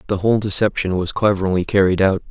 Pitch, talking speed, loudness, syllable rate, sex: 95 Hz, 180 wpm, -18 LUFS, 6.3 syllables/s, male